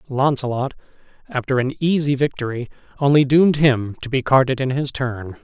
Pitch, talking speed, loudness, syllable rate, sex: 130 Hz, 155 wpm, -19 LUFS, 5.3 syllables/s, male